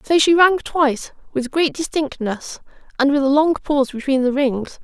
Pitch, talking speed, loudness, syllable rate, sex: 285 Hz, 185 wpm, -18 LUFS, 4.8 syllables/s, female